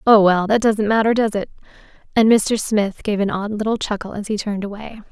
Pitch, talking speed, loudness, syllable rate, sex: 210 Hz, 225 wpm, -18 LUFS, 5.7 syllables/s, female